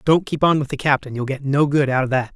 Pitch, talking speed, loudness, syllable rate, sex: 140 Hz, 355 wpm, -19 LUFS, 6.7 syllables/s, male